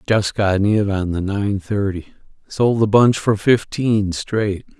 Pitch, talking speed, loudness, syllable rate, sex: 105 Hz, 165 wpm, -18 LUFS, 3.6 syllables/s, male